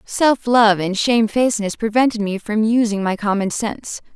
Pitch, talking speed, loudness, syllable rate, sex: 220 Hz, 160 wpm, -17 LUFS, 5.1 syllables/s, female